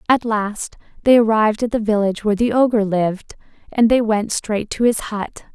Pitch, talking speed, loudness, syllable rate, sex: 215 Hz, 195 wpm, -18 LUFS, 5.4 syllables/s, female